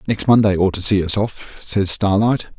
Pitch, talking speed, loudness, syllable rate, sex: 100 Hz, 210 wpm, -17 LUFS, 4.8 syllables/s, male